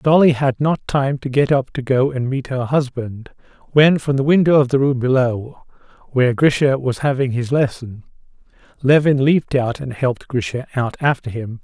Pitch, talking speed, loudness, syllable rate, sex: 130 Hz, 185 wpm, -17 LUFS, 5.0 syllables/s, male